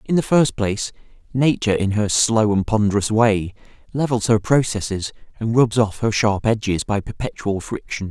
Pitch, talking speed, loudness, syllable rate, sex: 110 Hz, 170 wpm, -19 LUFS, 5.0 syllables/s, male